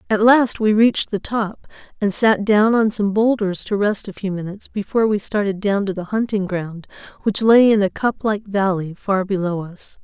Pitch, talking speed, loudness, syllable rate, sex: 205 Hz, 205 wpm, -18 LUFS, 5.1 syllables/s, female